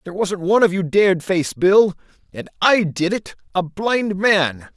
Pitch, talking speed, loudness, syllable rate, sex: 190 Hz, 175 wpm, -18 LUFS, 4.6 syllables/s, male